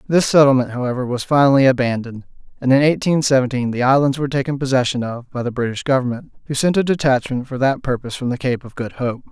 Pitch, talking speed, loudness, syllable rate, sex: 130 Hz, 215 wpm, -18 LUFS, 6.6 syllables/s, male